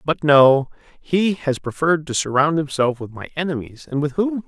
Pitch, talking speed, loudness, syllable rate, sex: 145 Hz, 190 wpm, -19 LUFS, 4.9 syllables/s, male